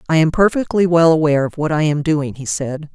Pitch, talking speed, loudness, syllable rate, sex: 155 Hz, 245 wpm, -16 LUFS, 5.9 syllables/s, female